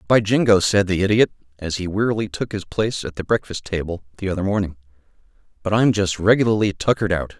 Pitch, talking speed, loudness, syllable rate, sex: 100 Hz, 195 wpm, -20 LUFS, 6.4 syllables/s, male